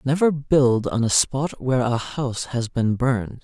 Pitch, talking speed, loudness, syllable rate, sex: 130 Hz, 190 wpm, -21 LUFS, 4.5 syllables/s, male